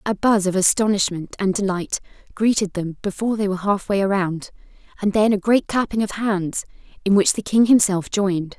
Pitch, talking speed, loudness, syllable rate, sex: 200 Hz, 190 wpm, -20 LUFS, 5.5 syllables/s, female